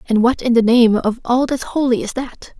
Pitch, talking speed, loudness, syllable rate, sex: 240 Hz, 255 wpm, -16 LUFS, 4.9 syllables/s, female